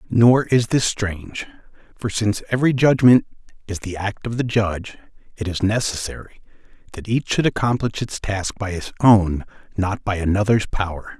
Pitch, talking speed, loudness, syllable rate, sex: 105 Hz, 160 wpm, -20 LUFS, 5.1 syllables/s, male